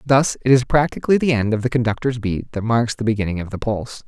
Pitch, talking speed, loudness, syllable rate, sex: 120 Hz, 250 wpm, -19 LUFS, 6.4 syllables/s, male